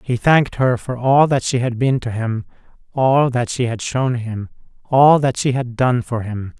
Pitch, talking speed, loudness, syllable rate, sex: 125 Hz, 220 wpm, -17 LUFS, 4.4 syllables/s, male